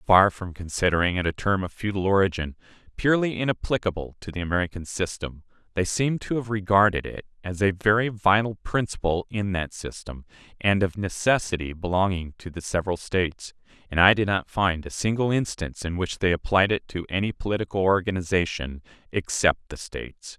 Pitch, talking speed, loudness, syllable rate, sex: 95 Hz, 165 wpm, -25 LUFS, 5.6 syllables/s, male